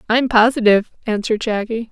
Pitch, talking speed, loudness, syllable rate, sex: 225 Hz, 125 wpm, -17 LUFS, 6.3 syllables/s, female